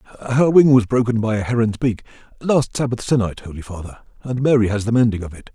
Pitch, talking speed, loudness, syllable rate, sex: 115 Hz, 215 wpm, -18 LUFS, 6.5 syllables/s, male